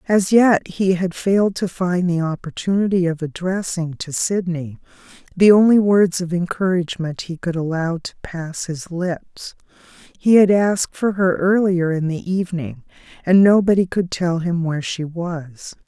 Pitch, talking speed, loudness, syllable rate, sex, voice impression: 175 Hz, 160 wpm, -19 LUFS, 4.5 syllables/s, female, very feminine, very middle-aged, old, very thin, very relaxed, weak, slightly bright, very soft, very clear, fluent, slightly raspy, slightly cute, cool, very intellectual, refreshing, sincere, very calm, very friendly, very reassuring, unique, very elegant, slightly sweet, very kind, modest, light